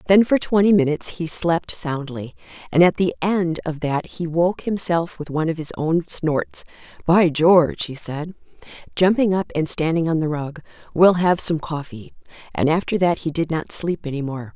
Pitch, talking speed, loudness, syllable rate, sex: 165 Hz, 190 wpm, -20 LUFS, 4.8 syllables/s, female